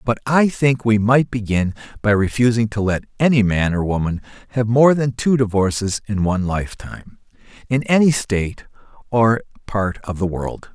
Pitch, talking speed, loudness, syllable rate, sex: 110 Hz, 165 wpm, -18 LUFS, 5.0 syllables/s, male